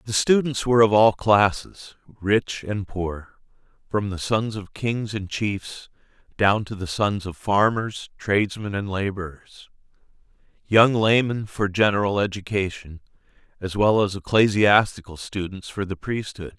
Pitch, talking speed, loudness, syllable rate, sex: 100 Hz, 130 wpm, -22 LUFS, 4.1 syllables/s, male